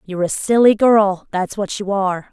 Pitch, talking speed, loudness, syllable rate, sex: 200 Hz, 205 wpm, -16 LUFS, 5.1 syllables/s, female